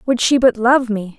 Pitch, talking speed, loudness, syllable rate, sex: 235 Hz, 255 wpm, -15 LUFS, 4.7 syllables/s, female